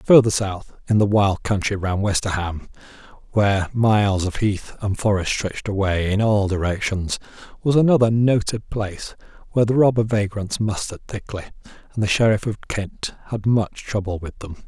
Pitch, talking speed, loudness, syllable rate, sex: 105 Hz, 160 wpm, -21 LUFS, 5.1 syllables/s, male